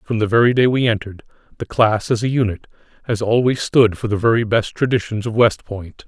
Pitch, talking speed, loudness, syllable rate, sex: 110 Hz, 215 wpm, -17 LUFS, 5.8 syllables/s, male